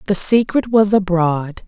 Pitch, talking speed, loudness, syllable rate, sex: 195 Hz, 145 wpm, -16 LUFS, 4.0 syllables/s, female